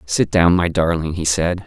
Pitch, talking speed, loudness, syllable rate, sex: 85 Hz, 215 wpm, -17 LUFS, 4.5 syllables/s, male